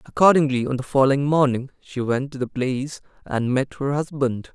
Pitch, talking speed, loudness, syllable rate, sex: 135 Hz, 185 wpm, -21 LUFS, 5.5 syllables/s, male